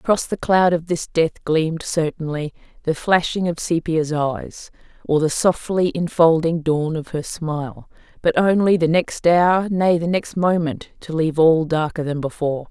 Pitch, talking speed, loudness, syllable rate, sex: 165 Hz, 170 wpm, -19 LUFS, 4.5 syllables/s, female